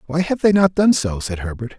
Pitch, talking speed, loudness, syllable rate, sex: 145 Hz, 270 wpm, -18 LUFS, 5.5 syllables/s, male